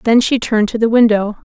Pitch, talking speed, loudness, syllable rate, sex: 225 Hz, 240 wpm, -14 LUFS, 6.2 syllables/s, female